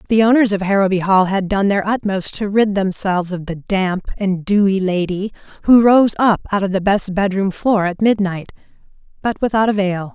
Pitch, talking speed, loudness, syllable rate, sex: 195 Hz, 190 wpm, -16 LUFS, 5.1 syllables/s, female